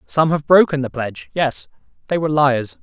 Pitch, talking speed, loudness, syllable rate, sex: 145 Hz, 190 wpm, -18 LUFS, 5.4 syllables/s, male